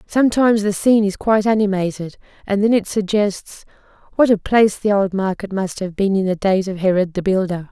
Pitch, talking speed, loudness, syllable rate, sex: 200 Hz, 200 wpm, -17 LUFS, 5.8 syllables/s, female